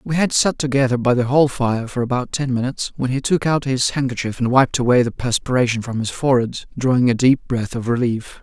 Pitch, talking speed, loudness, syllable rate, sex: 125 Hz, 230 wpm, -19 LUFS, 5.7 syllables/s, male